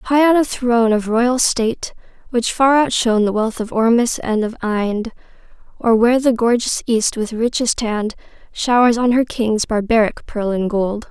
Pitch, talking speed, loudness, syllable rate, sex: 230 Hz, 180 wpm, -17 LUFS, 4.6 syllables/s, female